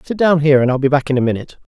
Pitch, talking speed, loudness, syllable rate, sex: 145 Hz, 350 wpm, -15 LUFS, 8.5 syllables/s, male